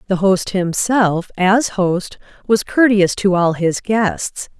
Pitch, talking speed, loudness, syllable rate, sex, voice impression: 195 Hz, 145 wpm, -16 LUFS, 3.3 syllables/s, female, feminine, very adult-like, slightly intellectual, slightly calm, slightly elegant